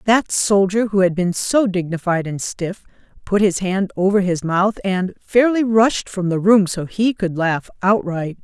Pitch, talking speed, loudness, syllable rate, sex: 195 Hz, 185 wpm, -18 LUFS, 4.2 syllables/s, female